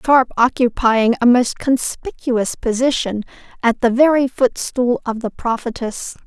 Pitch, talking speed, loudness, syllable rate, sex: 245 Hz, 125 wpm, -17 LUFS, 4.2 syllables/s, female